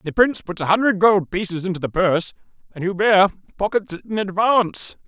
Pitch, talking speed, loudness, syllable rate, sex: 190 Hz, 190 wpm, -19 LUFS, 6.0 syllables/s, male